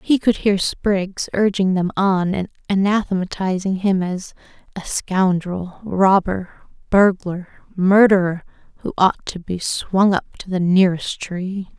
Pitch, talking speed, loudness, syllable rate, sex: 190 Hz, 130 wpm, -19 LUFS, 4.0 syllables/s, female